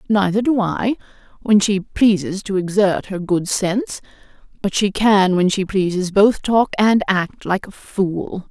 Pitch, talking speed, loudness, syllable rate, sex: 200 Hz, 155 wpm, -18 LUFS, 4.0 syllables/s, female